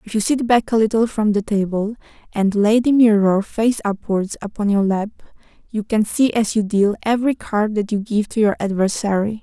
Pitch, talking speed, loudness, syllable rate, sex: 215 Hz, 205 wpm, -18 LUFS, 5.1 syllables/s, female